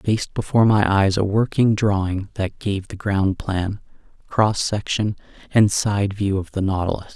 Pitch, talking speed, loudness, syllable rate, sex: 100 Hz, 175 wpm, -20 LUFS, 4.8 syllables/s, male